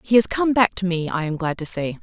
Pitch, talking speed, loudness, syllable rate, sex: 190 Hz, 325 wpm, -21 LUFS, 5.8 syllables/s, female